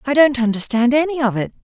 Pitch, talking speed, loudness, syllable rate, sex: 255 Hz, 220 wpm, -16 LUFS, 6.4 syllables/s, female